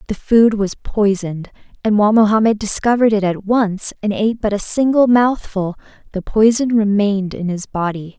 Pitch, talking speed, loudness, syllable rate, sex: 210 Hz, 170 wpm, -16 LUFS, 5.3 syllables/s, female